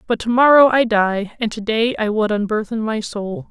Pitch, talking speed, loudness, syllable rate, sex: 225 Hz, 190 wpm, -17 LUFS, 5.0 syllables/s, female